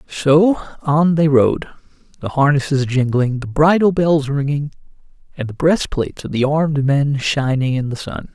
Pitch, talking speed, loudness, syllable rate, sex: 145 Hz, 160 wpm, -17 LUFS, 4.6 syllables/s, male